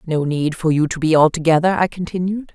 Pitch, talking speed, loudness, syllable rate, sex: 165 Hz, 210 wpm, -17 LUFS, 5.8 syllables/s, female